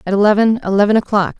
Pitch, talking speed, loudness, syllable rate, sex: 205 Hz, 130 wpm, -14 LUFS, 7.3 syllables/s, female